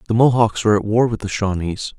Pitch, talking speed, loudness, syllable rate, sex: 110 Hz, 240 wpm, -18 LUFS, 6.2 syllables/s, male